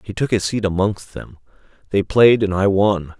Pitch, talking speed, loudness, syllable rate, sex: 100 Hz, 205 wpm, -17 LUFS, 4.7 syllables/s, male